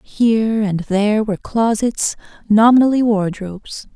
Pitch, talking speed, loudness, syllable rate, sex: 215 Hz, 105 wpm, -16 LUFS, 4.6 syllables/s, female